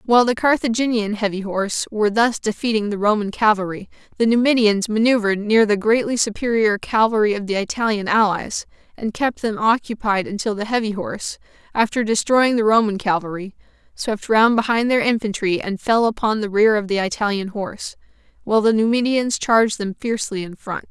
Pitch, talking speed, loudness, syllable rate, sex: 215 Hz, 165 wpm, -19 LUFS, 5.6 syllables/s, female